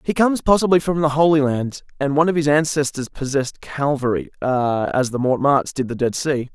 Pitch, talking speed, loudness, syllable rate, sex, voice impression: 140 Hz, 190 wpm, -19 LUFS, 5.6 syllables/s, male, masculine, middle-aged, powerful, bright, raspy, friendly, slightly unique, wild, lively, intense, slightly light